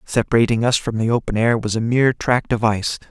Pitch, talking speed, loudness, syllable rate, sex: 115 Hz, 230 wpm, -18 LUFS, 6.2 syllables/s, male